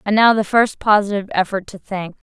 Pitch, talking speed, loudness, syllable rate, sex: 200 Hz, 205 wpm, -17 LUFS, 5.9 syllables/s, female